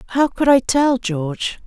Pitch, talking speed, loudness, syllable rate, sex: 240 Hz, 180 wpm, -17 LUFS, 4.4 syllables/s, female